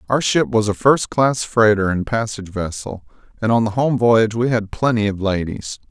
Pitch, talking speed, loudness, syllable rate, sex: 110 Hz, 205 wpm, -18 LUFS, 5.2 syllables/s, male